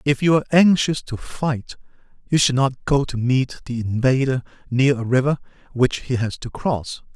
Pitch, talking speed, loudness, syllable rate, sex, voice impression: 130 Hz, 185 wpm, -20 LUFS, 4.8 syllables/s, male, masculine, adult-like, slightly middle-aged, slightly thick, slightly tensed, slightly powerful, slightly bright, hard, clear, fluent, slightly cool, intellectual, refreshing, very sincere, very calm, slightly mature, slightly friendly, reassuring, unique, elegant, slightly wild, slightly sweet, slightly lively, kind, slightly modest